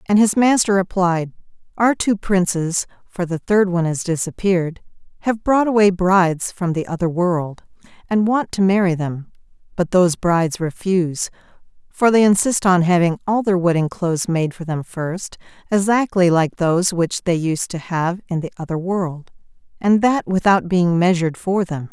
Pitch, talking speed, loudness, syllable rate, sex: 180 Hz, 165 wpm, -18 LUFS, 4.8 syllables/s, female